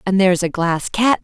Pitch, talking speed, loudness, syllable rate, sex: 190 Hz, 240 wpm, -17 LUFS, 5.6 syllables/s, female